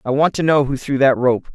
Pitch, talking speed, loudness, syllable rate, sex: 135 Hz, 310 wpm, -17 LUFS, 5.6 syllables/s, male